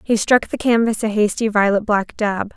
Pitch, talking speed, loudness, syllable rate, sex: 215 Hz, 210 wpm, -18 LUFS, 4.9 syllables/s, female